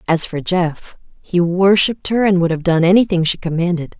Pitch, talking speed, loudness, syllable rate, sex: 175 Hz, 195 wpm, -16 LUFS, 5.3 syllables/s, female